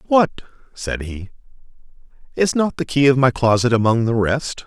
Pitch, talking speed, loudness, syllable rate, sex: 130 Hz, 165 wpm, -18 LUFS, 4.8 syllables/s, male